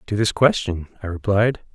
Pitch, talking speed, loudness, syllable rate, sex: 100 Hz, 170 wpm, -21 LUFS, 4.9 syllables/s, male